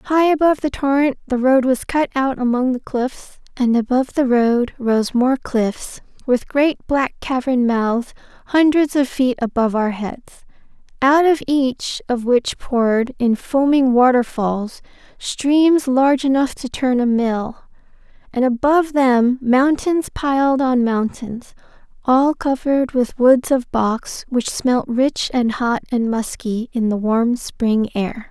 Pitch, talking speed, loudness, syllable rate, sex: 255 Hz, 150 wpm, -18 LUFS, 3.9 syllables/s, female